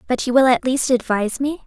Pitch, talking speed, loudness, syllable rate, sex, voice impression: 255 Hz, 250 wpm, -18 LUFS, 6.0 syllables/s, female, feminine, young, tensed, powerful, bright, clear, fluent, cute, friendly, lively, slightly kind